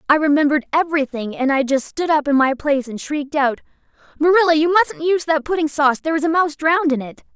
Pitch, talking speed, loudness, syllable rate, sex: 295 Hz, 230 wpm, -18 LUFS, 6.8 syllables/s, female